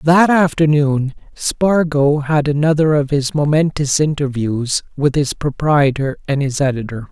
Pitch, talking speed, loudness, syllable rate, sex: 145 Hz, 125 wpm, -16 LUFS, 4.2 syllables/s, male